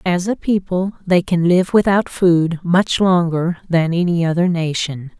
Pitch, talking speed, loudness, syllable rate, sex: 175 Hz, 160 wpm, -17 LUFS, 4.2 syllables/s, female